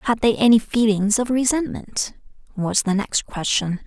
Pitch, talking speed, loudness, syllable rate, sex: 220 Hz, 155 wpm, -20 LUFS, 4.5 syllables/s, female